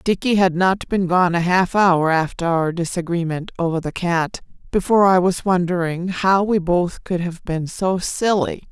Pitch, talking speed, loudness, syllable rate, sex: 180 Hz, 180 wpm, -19 LUFS, 4.5 syllables/s, female